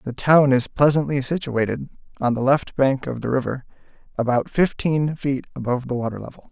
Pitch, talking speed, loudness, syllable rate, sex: 135 Hz, 175 wpm, -21 LUFS, 5.5 syllables/s, male